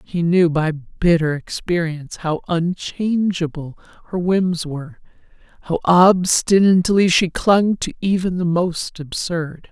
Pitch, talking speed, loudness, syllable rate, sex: 175 Hz, 115 wpm, -18 LUFS, 3.9 syllables/s, female